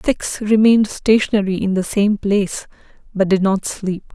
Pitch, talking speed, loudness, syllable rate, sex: 200 Hz, 160 wpm, -17 LUFS, 4.8 syllables/s, female